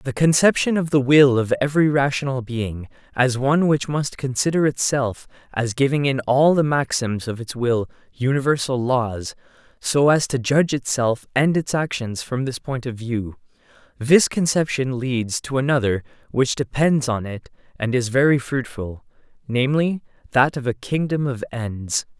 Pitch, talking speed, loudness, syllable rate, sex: 130 Hz, 160 wpm, -20 LUFS, 4.6 syllables/s, male